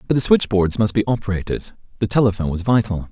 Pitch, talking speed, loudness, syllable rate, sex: 105 Hz, 195 wpm, -19 LUFS, 6.8 syllables/s, male